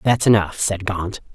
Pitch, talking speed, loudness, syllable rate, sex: 100 Hz, 180 wpm, -19 LUFS, 4.4 syllables/s, female